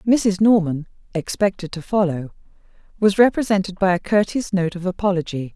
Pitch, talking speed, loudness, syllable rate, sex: 190 Hz, 140 wpm, -20 LUFS, 5.2 syllables/s, female